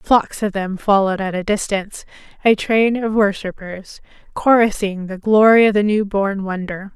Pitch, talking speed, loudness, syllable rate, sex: 205 Hz, 165 wpm, -17 LUFS, 4.7 syllables/s, female